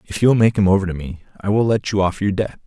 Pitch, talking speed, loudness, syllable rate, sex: 100 Hz, 340 wpm, -18 LUFS, 6.9 syllables/s, male